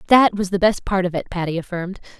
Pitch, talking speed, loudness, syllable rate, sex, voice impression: 190 Hz, 245 wpm, -20 LUFS, 6.8 syllables/s, female, very feminine, slightly young, slightly adult-like, thin, tensed, slightly powerful, bright, slightly hard, clear, slightly cute, very refreshing, slightly sincere, slightly calm, friendly, reassuring, lively, slightly strict, slightly sharp